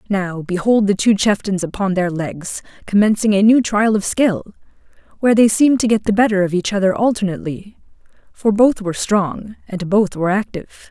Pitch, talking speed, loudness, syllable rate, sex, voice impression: 200 Hz, 180 wpm, -16 LUFS, 5.3 syllables/s, female, feminine, adult-like, intellectual, slightly calm, slightly lively